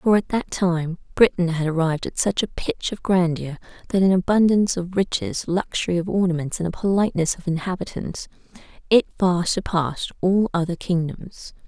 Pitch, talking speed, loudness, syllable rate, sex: 180 Hz, 160 wpm, -22 LUFS, 5.2 syllables/s, female